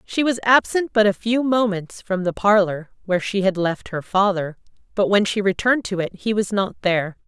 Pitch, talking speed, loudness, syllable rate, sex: 200 Hz, 215 wpm, -20 LUFS, 5.3 syllables/s, female